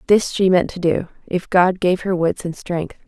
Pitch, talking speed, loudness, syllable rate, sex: 180 Hz, 235 wpm, -19 LUFS, 4.5 syllables/s, female